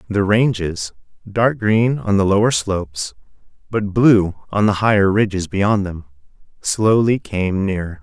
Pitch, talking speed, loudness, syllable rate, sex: 100 Hz, 140 wpm, -17 LUFS, 4.1 syllables/s, male